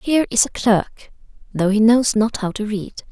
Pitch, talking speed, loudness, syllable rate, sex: 220 Hz, 230 wpm, -18 LUFS, 4.6 syllables/s, female